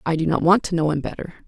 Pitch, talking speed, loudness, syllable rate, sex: 165 Hz, 325 wpm, -20 LUFS, 6.7 syllables/s, female